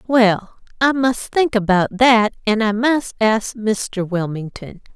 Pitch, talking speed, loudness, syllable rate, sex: 220 Hz, 145 wpm, -17 LUFS, 3.5 syllables/s, female